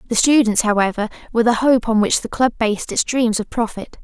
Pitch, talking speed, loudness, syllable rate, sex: 225 Hz, 225 wpm, -17 LUFS, 6.0 syllables/s, female